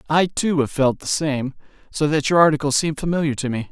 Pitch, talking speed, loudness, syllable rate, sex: 150 Hz, 225 wpm, -20 LUFS, 6.0 syllables/s, male